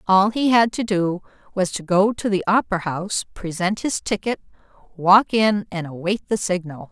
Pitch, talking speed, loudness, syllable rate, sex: 195 Hz, 180 wpm, -20 LUFS, 4.8 syllables/s, female